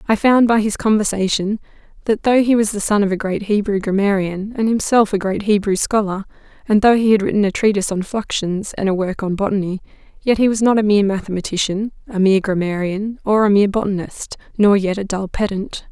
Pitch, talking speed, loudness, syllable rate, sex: 205 Hz, 205 wpm, -17 LUFS, 5.9 syllables/s, female